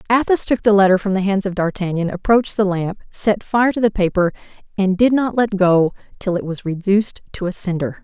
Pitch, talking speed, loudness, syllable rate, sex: 195 Hz, 215 wpm, -18 LUFS, 5.6 syllables/s, female